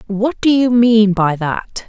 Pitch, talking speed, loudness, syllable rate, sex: 220 Hz, 190 wpm, -14 LUFS, 3.5 syllables/s, female